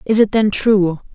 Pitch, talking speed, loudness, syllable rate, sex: 205 Hz, 210 wpm, -15 LUFS, 4.4 syllables/s, female